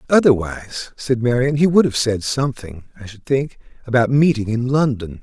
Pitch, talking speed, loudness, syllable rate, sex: 125 Hz, 170 wpm, -18 LUFS, 5.2 syllables/s, male